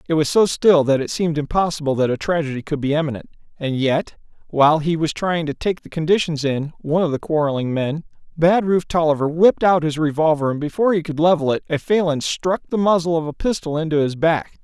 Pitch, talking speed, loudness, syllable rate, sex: 160 Hz, 215 wpm, -19 LUFS, 6.2 syllables/s, male